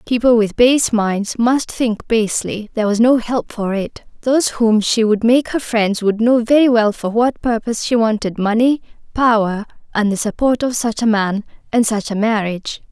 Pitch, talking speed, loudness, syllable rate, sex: 225 Hz, 195 wpm, -16 LUFS, 4.8 syllables/s, female